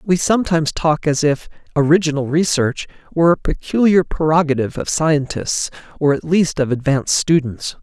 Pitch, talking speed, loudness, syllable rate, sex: 155 Hz, 145 wpm, -17 LUFS, 5.3 syllables/s, male